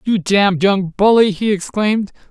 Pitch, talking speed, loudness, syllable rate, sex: 200 Hz, 155 wpm, -15 LUFS, 4.9 syllables/s, male